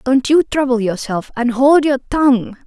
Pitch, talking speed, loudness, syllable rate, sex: 255 Hz, 160 wpm, -15 LUFS, 4.5 syllables/s, female